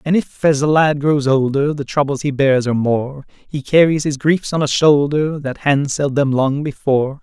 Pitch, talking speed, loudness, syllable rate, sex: 145 Hz, 205 wpm, -16 LUFS, 4.9 syllables/s, male